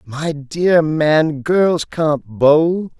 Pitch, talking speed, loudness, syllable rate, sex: 155 Hz, 120 wpm, -16 LUFS, 2.1 syllables/s, male